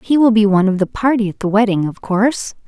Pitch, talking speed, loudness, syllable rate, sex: 210 Hz, 270 wpm, -15 LUFS, 6.5 syllables/s, female